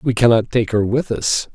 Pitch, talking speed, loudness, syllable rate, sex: 115 Hz, 235 wpm, -17 LUFS, 4.7 syllables/s, male